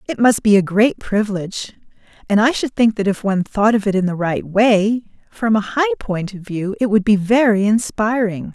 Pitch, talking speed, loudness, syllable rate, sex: 205 Hz, 205 wpm, -17 LUFS, 5.2 syllables/s, female